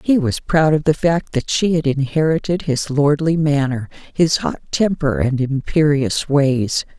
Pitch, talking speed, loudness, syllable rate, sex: 150 Hz, 165 wpm, -17 LUFS, 4.2 syllables/s, female